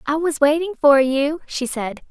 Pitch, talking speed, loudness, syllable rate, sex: 290 Hz, 200 wpm, -18 LUFS, 4.5 syllables/s, female